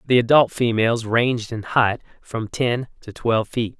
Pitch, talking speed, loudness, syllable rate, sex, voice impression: 115 Hz, 175 wpm, -20 LUFS, 4.7 syllables/s, male, masculine, adult-like, tensed, powerful, bright, soft, clear, intellectual, calm, friendly, wild, lively, slightly light